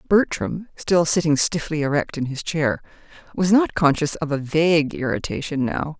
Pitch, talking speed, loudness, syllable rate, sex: 155 Hz, 160 wpm, -21 LUFS, 4.8 syllables/s, female